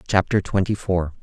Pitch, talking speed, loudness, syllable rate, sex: 95 Hz, 145 wpm, -22 LUFS, 5.0 syllables/s, male